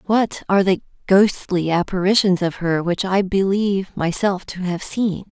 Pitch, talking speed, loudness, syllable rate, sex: 190 Hz, 155 wpm, -19 LUFS, 4.6 syllables/s, female